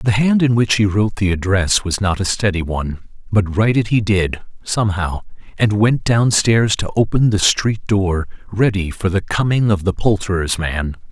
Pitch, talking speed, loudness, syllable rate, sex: 100 Hz, 195 wpm, -17 LUFS, 4.9 syllables/s, male